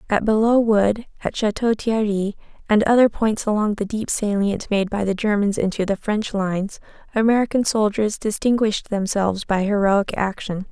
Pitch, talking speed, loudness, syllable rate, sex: 210 Hz, 155 wpm, -20 LUFS, 5.0 syllables/s, female